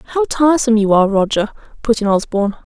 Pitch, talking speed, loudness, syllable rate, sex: 230 Hz, 175 wpm, -15 LUFS, 6.6 syllables/s, female